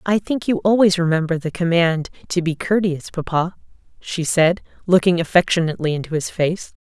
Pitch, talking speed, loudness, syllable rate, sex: 175 Hz, 160 wpm, -19 LUFS, 5.4 syllables/s, female